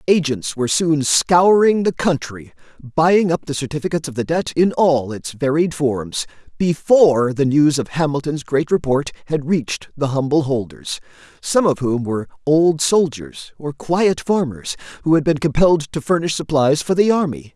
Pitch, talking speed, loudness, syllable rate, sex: 150 Hz, 165 wpm, -18 LUFS, 4.7 syllables/s, male